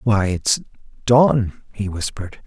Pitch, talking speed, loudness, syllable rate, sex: 110 Hz, 120 wpm, -19 LUFS, 3.8 syllables/s, male